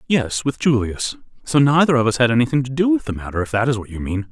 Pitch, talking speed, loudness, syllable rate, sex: 120 Hz, 280 wpm, -19 LUFS, 6.4 syllables/s, male